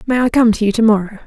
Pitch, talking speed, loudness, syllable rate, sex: 225 Hz, 330 wpm, -14 LUFS, 7.5 syllables/s, female